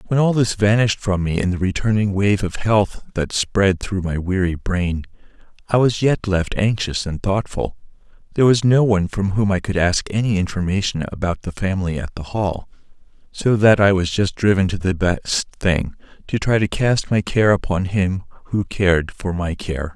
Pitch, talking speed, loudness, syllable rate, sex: 95 Hz, 190 wpm, -19 LUFS, 4.9 syllables/s, male